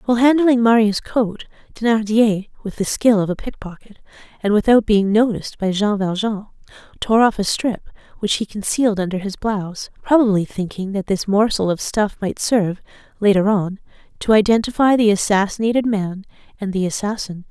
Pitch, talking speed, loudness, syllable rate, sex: 210 Hz, 160 wpm, -18 LUFS, 5.3 syllables/s, female